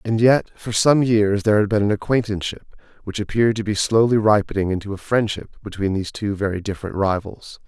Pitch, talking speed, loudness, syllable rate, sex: 105 Hz, 195 wpm, -20 LUFS, 6.1 syllables/s, male